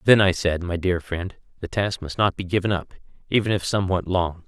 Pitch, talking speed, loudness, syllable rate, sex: 90 Hz, 230 wpm, -23 LUFS, 5.7 syllables/s, male